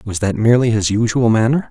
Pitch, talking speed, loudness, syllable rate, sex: 110 Hz, 210 wpm, -15 LUFS, 6.0 syllables/s, male